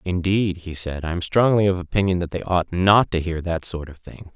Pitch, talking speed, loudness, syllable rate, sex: 90 Hz, 250 wpm, -21 LUFS, 5.2 syllables/s, male